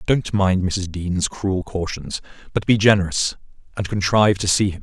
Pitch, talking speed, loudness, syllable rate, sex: 95 Hz, 175 wpm, -20 LUFS, 4.8 syllables/s, male